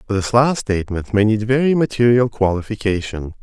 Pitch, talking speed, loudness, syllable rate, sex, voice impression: 110 Hz, 140 wpm, -17 LUFS, 5.4 syllables/s, male, masculine, adult-like, slightly thick, slightly soft, sincere, slightly calm, slightly kind